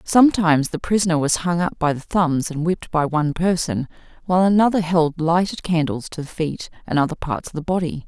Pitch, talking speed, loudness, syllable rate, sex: 165 Hz, 210 wpm, -20 LUFS, 5.8 syllables/s, female